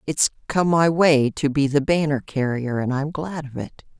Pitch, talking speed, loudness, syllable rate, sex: 145 Hz, 210 wpm, -21 LUFS, 4.5 syllables/s, female